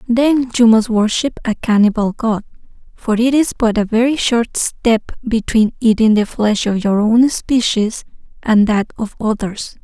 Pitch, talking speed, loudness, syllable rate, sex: 225 Hz, 165 wpm, -15 LUFS, 4.1 syllables/s, female